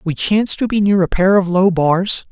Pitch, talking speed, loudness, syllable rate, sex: 190 Hz, 260 wpm, -15 LUFS, 5.1 syllables/s, male